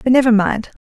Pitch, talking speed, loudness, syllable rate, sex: 230 Hz, 220 wpm, -15 LUFS, 5.8 syllables/s, female